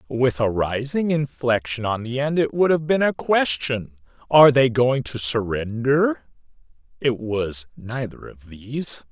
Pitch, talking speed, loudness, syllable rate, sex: 125 Hz, 150 wpm, -21 LUFS, 4.2 syllables/s, male